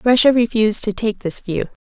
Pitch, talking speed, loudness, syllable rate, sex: 220 Hz, 195 wpm, -17 LUFS, 5.6 syllables/s, female